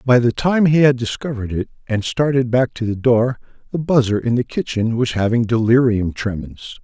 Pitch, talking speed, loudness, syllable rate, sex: 120 Hz, 195 wpm, -18 LUFS, 5.2 syllables/s, male